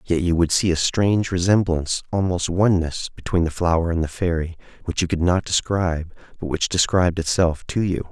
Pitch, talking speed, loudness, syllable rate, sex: 85 Hz, 190 wpm, -21 LUFS, 5.6 syllables/s, male